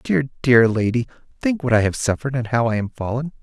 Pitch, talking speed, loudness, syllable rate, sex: 120 Hz, 230 wpm, -20 LUFS, 6.1 syllables/s, male